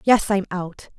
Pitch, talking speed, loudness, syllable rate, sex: 195 Hz, 185 wpm, -21 LUFS, 4.0 syllables/s, female